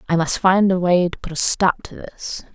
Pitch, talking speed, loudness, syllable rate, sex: 180 Hz, 260 wpm, -18 LUFS, 4.8 syllables/s, female